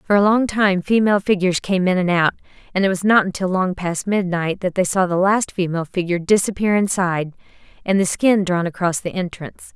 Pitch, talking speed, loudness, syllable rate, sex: 185 Hz, 210 wpm, -19 LUFS, 5.8 syllables/s, female